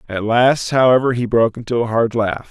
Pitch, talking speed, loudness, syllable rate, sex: 120 Hz, 215 wpm, -16 LUFS, 5.6 syllables/s, male